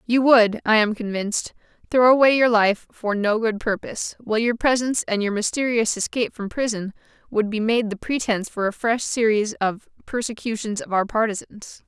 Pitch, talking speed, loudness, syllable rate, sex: 220 Hz, 180 wpm, -21 LUFS, 5.3 syllables/s, female